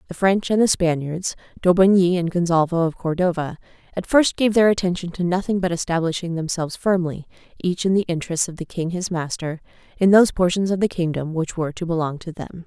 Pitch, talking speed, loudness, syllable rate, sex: 175 Hz, 200 wpm, -21 LUFS, 5.9 syllables/s, female